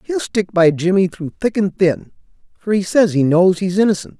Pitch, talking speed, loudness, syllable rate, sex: 190 Hz, 215 wpm, -16 LUFS, 5.0 syllables/s, male